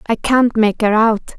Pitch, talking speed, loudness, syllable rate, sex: 220 Hz, 215 wpm, -14 LUFS, 4.8 syllables/s, female